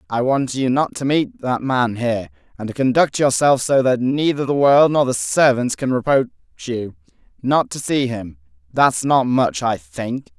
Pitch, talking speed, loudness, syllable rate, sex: 120 Hz, 190 wpm, -18 LUFS, 4.5 syllables/s, male